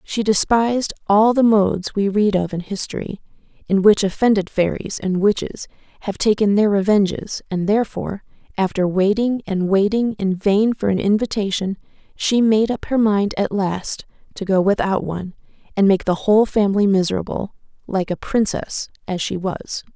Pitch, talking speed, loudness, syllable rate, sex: 200 Hz, 160 wpm, -19 LUFS, 5.0 syllables/s, female